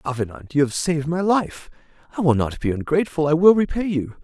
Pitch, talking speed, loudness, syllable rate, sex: 150 Hz, 210 wpm, -20 LUFS, 6.0 syllables/s, male